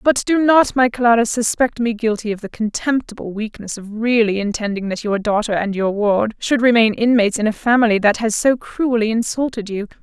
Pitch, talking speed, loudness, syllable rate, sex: 225 Hz, 195 wpm, -17 LUFS, 5.3 syllables/s, female